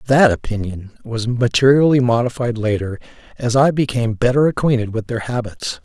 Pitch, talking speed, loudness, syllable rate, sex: 120 Hz, 145 wpm, -17 LUFS, 5.5 syllables/s, male